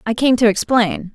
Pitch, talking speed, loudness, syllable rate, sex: 225 Hz, 210 wpm, -16 LUFS, 4.9 syllables/s, female